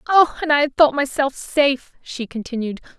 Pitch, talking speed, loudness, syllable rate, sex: 275 Hz, 160 wpm, -19 LUFS, 4.8 syllables/s, female